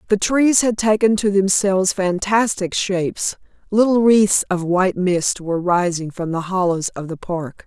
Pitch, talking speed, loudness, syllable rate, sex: 190 Hz, 165 wpm, -18 LUFS, 4.5 syllables/s, female